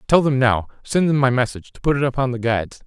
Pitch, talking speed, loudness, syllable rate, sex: 130 Hz, 230 wpm, -19 LUFS, 6.6 syllables/s, male